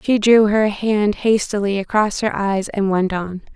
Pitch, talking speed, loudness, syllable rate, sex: 205 Hz, 185 wpm, -17 LUFS, 4.2 syllables/s, female